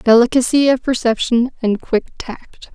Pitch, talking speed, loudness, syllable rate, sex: 240 Hz, 130 wpm, -16 LUFS, 4.5 syllables/s, female